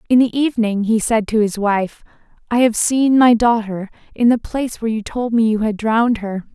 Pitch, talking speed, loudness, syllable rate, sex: 225 Hz, 220 wpm, -17 LUFS, 5.4 syllables/s, female